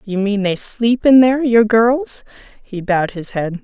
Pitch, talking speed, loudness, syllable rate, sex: 215 Hz, 180 wpm, -15 LUFS, 4.3 syllables/s, female